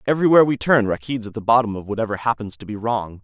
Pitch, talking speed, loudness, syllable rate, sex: 115 Hz, 240 wpm, -20 LUFS, 7.2 syllables/s, male